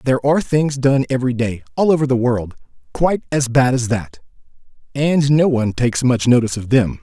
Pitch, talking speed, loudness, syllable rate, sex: 130 Hz, 195 wpm, -17 LUFS, 5.9 syllables/s, male